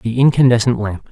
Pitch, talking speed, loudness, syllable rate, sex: 115 Hz, 160 wpm, -14 LUFS, 5.6 syllables/s, male